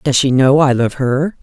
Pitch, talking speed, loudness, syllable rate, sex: 135 Hz, 250 wpm, -13 LUFS, 4.4 syllables/s, female